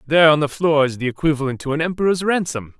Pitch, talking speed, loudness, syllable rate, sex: 150 Hz, 235 wpm, -18 LUFS, 6.7 syllables/s, male